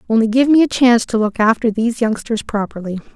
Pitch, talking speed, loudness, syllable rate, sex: 225 Hz, 210 wpm, -16 LUFS, 6.3 syllables/s, female